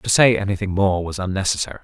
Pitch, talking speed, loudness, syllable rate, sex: 95 Hz, 195 wpm, -19 LUFS, 6.7 syllables/s, male